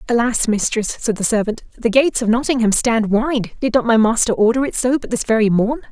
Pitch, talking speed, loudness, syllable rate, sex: 230 Hz, 225 wpm, -17 LUFS, 5.7 syllables/s, female